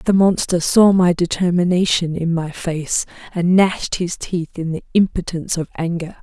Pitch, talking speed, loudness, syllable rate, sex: 175 Hz, 165 wpm, -18 LUFS, 4.8 syllables/s, female